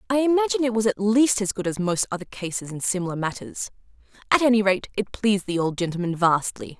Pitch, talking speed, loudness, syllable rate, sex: 205 Hz, 210 wpm, -23 LUFS, 6.3 syllables/s, female